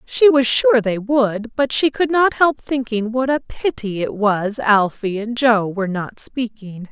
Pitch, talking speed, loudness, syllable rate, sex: 235 Hz, 190 wpm, -18 LUFS, 4.0 syllables/s, female